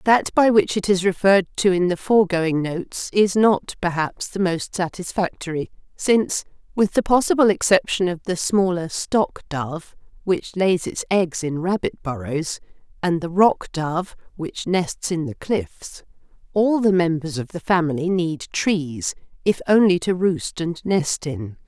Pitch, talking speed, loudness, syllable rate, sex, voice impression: 175 Hz, 160 wpm, -21 LUFS, 4.3 syllables/s, female, feminine, gender-neutral, very adult-like, middle-aged, slightly thin, tensed, powerful, slightly bright, slightly hard, clear, fluent, cool, very intellectual, refreshing, sincere, calm, slightly friendly, slightly reassuring, very unique, elegant, slightly wild, sweet, lively, strict, intense